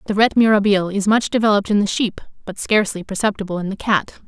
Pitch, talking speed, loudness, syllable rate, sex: 205 Hz, 210 wpm, -18 LUFS, 7.1 syllables/s, female